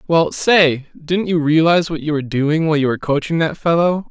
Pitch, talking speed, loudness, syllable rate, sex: 160 Hz, 220 wpm, -16 LUFS, 5.7 syllables/s, male